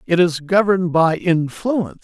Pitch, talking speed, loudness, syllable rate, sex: 175 Hz, 145 wpm, -17 LUFS, 4.8 syllables/s, male